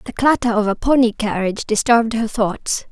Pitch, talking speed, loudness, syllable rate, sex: 225 Hz, 185 wpm, -18 LUFS, 5.5 syllables/s, female